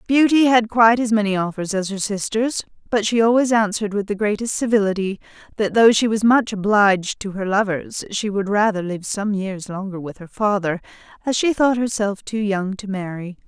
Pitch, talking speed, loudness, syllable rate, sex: 210 Hz, 195 wpm, -19 LUFS, 5.3 syllables/s, female